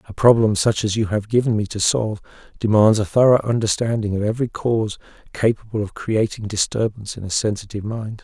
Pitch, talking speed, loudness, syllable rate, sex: 110 Hz, 180 wpm, -20 LUFS, 6.1 syllables/s, male